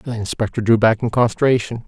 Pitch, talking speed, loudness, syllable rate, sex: 115 Hz, 190 wpm, -18 LUFS, 6.0 syllables/s, male